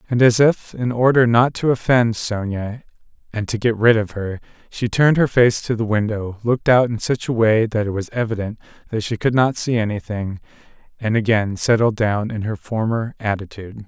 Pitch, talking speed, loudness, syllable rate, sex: 110 Hz, 200 wpm, -19 LUFS, 5.2 syllables/s, male